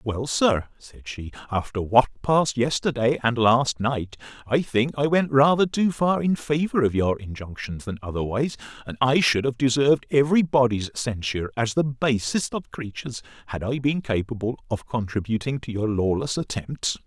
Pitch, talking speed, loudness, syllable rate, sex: 125 Hz, 170 wpm, -23 LUFS, 5.0 syllables/s, male